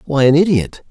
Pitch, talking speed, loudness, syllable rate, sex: 145 Hz, 200 wpm, -14 LUFS, 5.3 syllables/s, male